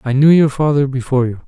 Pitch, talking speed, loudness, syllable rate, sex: 135 Hz, 245 wpm, -14 LUFS, 6.8 syllables/s, male